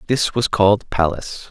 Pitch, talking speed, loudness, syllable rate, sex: 105 Hz, 160 wpm, -18 LUFS, 4.7 syllables/s, male